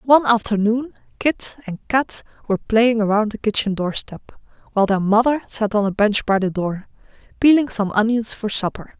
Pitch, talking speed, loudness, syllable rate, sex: 220 Hz, 175 wpm, -19 LUFS, 5.3 syllables/s, female